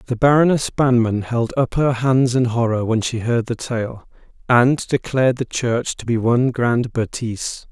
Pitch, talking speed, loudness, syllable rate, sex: 120 Hz, 180 wpm, -19 LUFS, 4.5 syllables/s, male